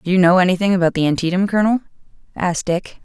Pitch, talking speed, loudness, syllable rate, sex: 185 Hz, 195 wpm, -17 LUFS, 7.5 syllables/s, female